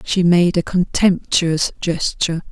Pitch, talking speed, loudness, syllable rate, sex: 175 Hz, 120 wpm, -17 LUFS, 3.9 syllables/s, female